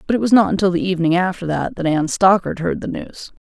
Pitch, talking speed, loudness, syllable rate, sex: 185 Hz, 260 wpm, -18 LUFS, 6.5 syllables/s, female